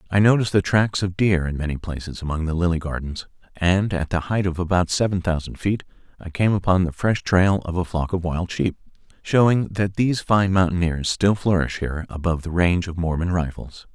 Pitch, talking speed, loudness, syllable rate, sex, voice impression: 90 Hz, 205 wpm, -22 LUFS, 5.5 syllables/s, male, masculine, adult-like, thick, slightly tensed, dark, slightly muffled, cool, intellectual, slightly mature, reassuring, wild, modest